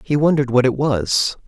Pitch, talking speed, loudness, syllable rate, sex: 130 Hz, 205 wpm, -17 LUFS, 5.4 syllables/s, male